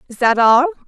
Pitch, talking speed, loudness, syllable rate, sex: 265 Hz, 205 wpm, -14 LUFS, 5.4 syllables/s, female